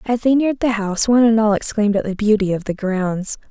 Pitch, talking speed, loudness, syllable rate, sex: 215 Hz, 255 wpm, -17 LUFS, 6.3 syllables/s, female